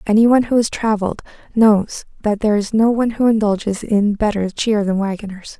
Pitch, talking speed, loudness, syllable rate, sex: 215 Hz, 195 wpm, -17 LUFS, 5.9 syllables/s, female